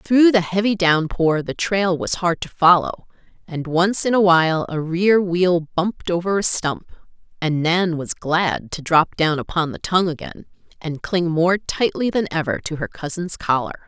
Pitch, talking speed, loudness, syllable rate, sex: 175 Hz, 185 wpm, -19 LUFS, 4.5 syllables/s, female